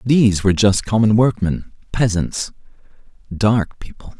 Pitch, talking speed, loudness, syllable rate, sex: 105 Hz, 115 wpm, -17 LUFS, 4.5 syllables/s, male